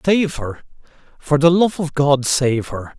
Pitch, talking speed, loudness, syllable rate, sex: 145 Hz, 180 wpm, -17 LUFS, 3.9 syllables/s, male